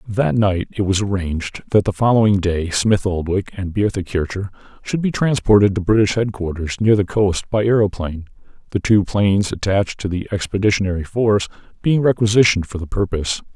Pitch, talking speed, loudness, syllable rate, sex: 100 Hz, 170 wpm, -18 LUFS, 5.7 syllables/s, male